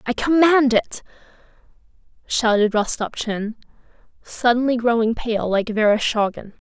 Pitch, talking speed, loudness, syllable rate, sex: 230 Hz, 90 wpm, -19 LUFS, 4.4 syllables/s, female